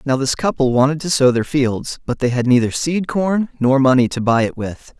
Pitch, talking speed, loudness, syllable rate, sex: 135 Hz, 240 wpm, -17 LUFS, 5.1 syllables/s, male